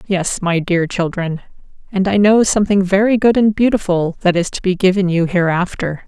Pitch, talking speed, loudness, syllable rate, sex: 190 Hz, 190 wpm, -15 LUFS, 5.2 syllables/s, female